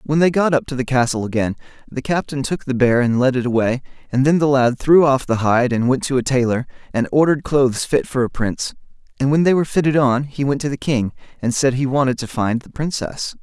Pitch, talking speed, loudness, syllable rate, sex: 135 Hz, 250 wpm, -18 LUFS, 5.9 syllables/s, male